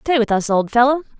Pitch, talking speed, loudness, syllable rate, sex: 245 Hz, 250 wpm, -17 LUFS, 5.9 syllables/s, female